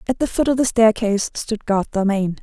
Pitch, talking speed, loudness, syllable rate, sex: 215 Hz, 225 wpm, -19 LUFS, 5.4 syllables/s, female